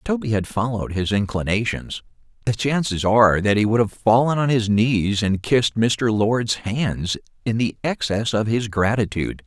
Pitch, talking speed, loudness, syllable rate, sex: 110 Hz, 180 wpm, -20 LUFS, 4.9 syllables/s, male